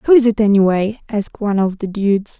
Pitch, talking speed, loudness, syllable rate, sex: 210 Hz, 225 wpm, -16 LUFS, 6.2 syllables/s, female